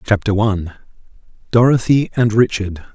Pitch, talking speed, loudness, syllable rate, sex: 110 Hz, 100 wpm, -16 LUFS, 5.0 syllables/s, male